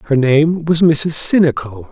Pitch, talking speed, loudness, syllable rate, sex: 150 Hz, 155 wpm, -13 LUFS, 3.7 syllables/s, male